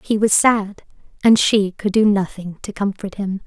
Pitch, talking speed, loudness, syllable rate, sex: 200 Hz, 190 wpm, -17 LUFS, 4.4 syllables/s, female